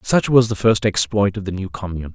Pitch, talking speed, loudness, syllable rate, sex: 100 Hz, 250 wpm, -18 LUFS, 5.9 syllables/s, male